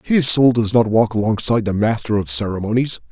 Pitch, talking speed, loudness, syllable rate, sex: 110 Hz, 195 wpm, -17 LUFS, 5.8 syllables/s, male